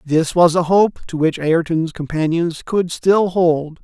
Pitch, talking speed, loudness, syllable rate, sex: 170 Hz, 170 wpm, -17 LUFS, 3.8 syllables/s, male